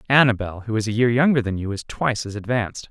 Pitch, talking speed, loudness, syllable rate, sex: 115 Hz, 250 wpm, -21 LUFS, 6.8 syllables/s, male